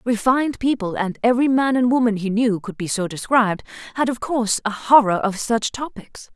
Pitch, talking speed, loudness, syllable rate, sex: 230 Hz, 180 wpm, -20 LUFS, 5.5 syllables/s, female